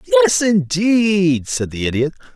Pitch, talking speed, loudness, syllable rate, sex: 185 Hz, 125 wpm, -16 LUFS, 3.4 syllables/s, male